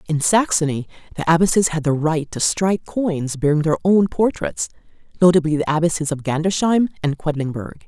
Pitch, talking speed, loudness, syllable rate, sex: 165 Hz, 160 wpm, -19 LUFS, 5.5 syllables/s, female